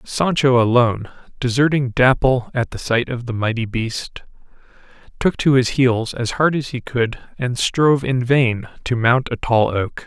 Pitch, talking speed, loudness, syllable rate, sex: 125 Hz, 175 wpm, -18 LUFS, 4.5 syllables/s, male